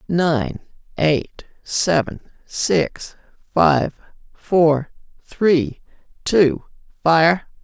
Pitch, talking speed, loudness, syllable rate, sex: 155 Hz, 70 wpm, -19 LUFS, 2.1 syllables/s, female